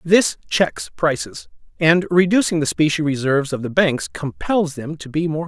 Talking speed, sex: 185 wpm, male